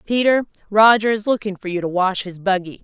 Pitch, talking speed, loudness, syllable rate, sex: 200 Hz, 210 wpm, -18 LUFS, 5.7 syllables/s, female